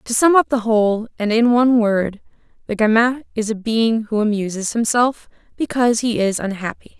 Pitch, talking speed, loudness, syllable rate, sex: 225 Hz, 180 wpm, -18 LUFS, 5.2 syllables/s, female